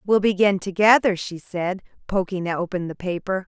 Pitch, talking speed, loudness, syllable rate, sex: 190 Hz, 150 wpm, -22 LUFS, 4.8 syllables/s, female